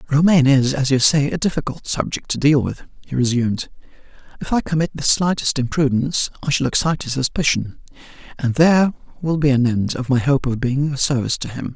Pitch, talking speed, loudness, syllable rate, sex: 140 Hz, 195 wpm, -18 LUFS, 6.0 syllables/s, male